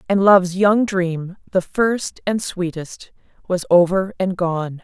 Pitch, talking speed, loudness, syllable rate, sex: 185 Hz, 150 wpm, -18 LUFS, 3.8 syllables/s, female